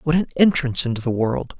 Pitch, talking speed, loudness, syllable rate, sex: 135 Hz, 225 wpm, -20 LUFS, 6.2 syllables/s, male